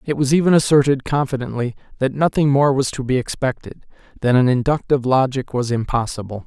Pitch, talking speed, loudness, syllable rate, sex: 130 Hz, 160 wpm, -18 LUFS, 5.9 syllables/s, male